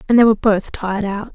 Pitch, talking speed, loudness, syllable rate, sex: 210 Hz, 265 wpm, -17 LUFS, 6.8 syllables/s, female